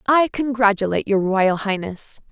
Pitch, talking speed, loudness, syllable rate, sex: 215 Hz, 130 wpm, -19 LUFS, 4.9 syllables/s, female